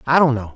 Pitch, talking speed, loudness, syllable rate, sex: 130 Hz, 320 wpm, -17 LUFS, 7.1 syllables/s, male